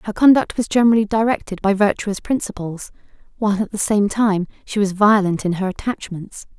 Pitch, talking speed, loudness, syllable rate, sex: 205 Hz, 175 wpm, -18 LUFS, 5.6 syllables/s, female